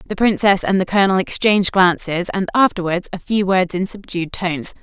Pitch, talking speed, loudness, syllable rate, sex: 190 Hz, 185 wpm, -17 LUFS, 5.6 syllables/s, female